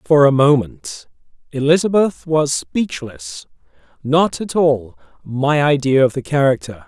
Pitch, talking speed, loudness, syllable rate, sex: 135 Hz, 115 wpm, -16 LUFS, 4.0 syllables/s, male